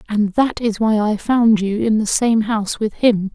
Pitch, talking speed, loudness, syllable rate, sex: 215 Hz, 235 wpm, -17 LUFS, 4.4 syllables/s, female